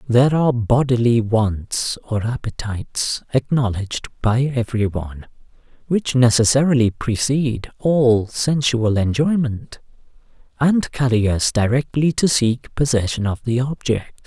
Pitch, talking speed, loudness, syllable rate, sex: 120 Hz, 110 wpm, -19 LUFS, 4.4 syllables/s, male